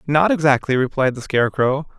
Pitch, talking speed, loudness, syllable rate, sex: 140 Hz, 150 wpm, -18 LUFS, 5.7 syllables/s, male